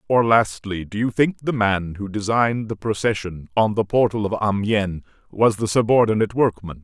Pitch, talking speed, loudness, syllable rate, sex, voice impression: 105 Hz, 175 wpm, -20 LUFS, 5.1 syllables/s, male, very masculine, old, very thick, tensed, very powerful, slightly bright, soft, slightly muffled, fluent, slightly raspy, very cool, intellectual, sincere, very calm, very mature, very friendly, very reassuring, unique, elegant, wild, sweet, lively, kind, slightly intense, slightly modest